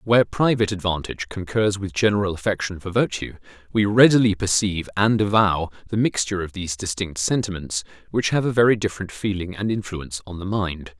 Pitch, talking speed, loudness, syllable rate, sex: 100 Hz, 170 wpm, -22 LUFS, 6.0 syllables/s, male